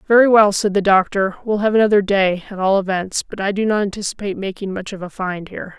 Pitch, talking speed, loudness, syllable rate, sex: 200 Hz, 240 wpm, -18 LUFS, 6.2 syllables/s, female